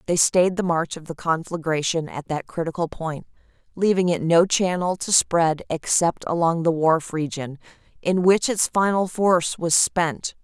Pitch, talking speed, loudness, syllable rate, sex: 170 Hz, 165 wpm, -21 LUFS, 4.4 syllables/s, female